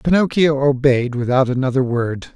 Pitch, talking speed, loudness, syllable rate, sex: 135 Hz, 130 wpm, -17 LUFS, 4.9 syllables/s, male